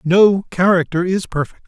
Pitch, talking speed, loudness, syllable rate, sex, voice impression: 180 Hz, 145 wpm, -16 LUFS, 4.6 syllables/s, male, masculine, middle-aged, tensed, powerful, soft, slightly muffled, raspy, slightly mature, friendly, reassuring, wild, lively, kind